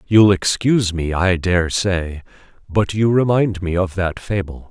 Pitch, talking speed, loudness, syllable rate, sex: 95 Hz, 165 wpm, -18 LUFS, 4.1 syllables/s, male